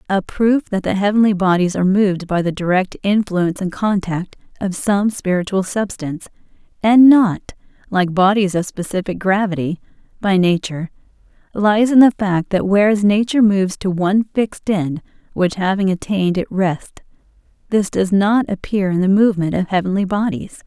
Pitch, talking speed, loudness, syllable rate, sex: 195 Hz, 155 wpm, -17 LUFS, 5.2 syllables/s, female